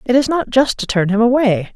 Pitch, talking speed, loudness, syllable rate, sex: 235 Hz, 275 wpm, -15 LUFS, 5.6 syllables/s, female